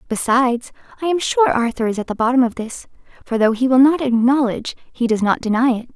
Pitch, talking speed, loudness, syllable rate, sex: 250 Hz, 220 wpm, -17 LUFS, 6.0 syllables/s, female